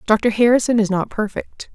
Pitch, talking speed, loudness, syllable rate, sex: 220 Hz, 170 wpm, -18 LUFS, 4.9 syllables/s, female